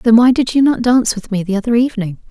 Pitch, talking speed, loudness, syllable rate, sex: 230 Hz, 285 wpm, -14 LUFS, 6.9 syllables/s, female